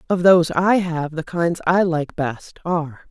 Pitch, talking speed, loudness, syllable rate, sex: 170 Hz, 195 wpm, -19 LUFS, 4.4 syllables/s, female